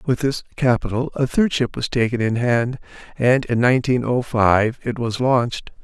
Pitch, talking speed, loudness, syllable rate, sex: 125 Hz, 185 wpm, -19 LUFS, 4.7 syllables/s, male